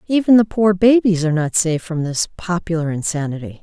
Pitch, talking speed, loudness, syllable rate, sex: 180 Hz, 180 wpm, -17 LUFS, 5.9 syllables/s, female